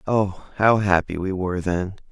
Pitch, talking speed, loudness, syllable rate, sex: 95 Hz, 170 wpm, -22 LUFS, 4.6 syllables/s, male